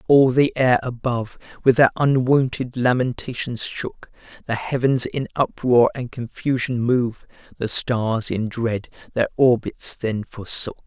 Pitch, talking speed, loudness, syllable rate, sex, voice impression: 120 Hz, 135 wpm, -21 LUFS, 3.2 syllables/s, male, masculine, adult-like, slightly middle-aged, thick, tensed, slightly powerful, slightly bright, hard, clear, fluent, slightly cool, intellectual, slightly refreshing, sincere, very calm, slightly mature, slightly friendly, slightly reassuring, unique, slightly wild, lively, slightly strict, slightly intense, slightly sharp